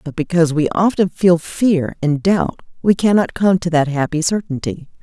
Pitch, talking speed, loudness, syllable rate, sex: 170 Hz, 180 wpm, -17 LUFS, 4.8 syllables/s, female